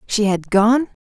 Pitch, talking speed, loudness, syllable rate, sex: 215 Hz, 175 wpm, -17 LUFS, 4.0 syllables/s, male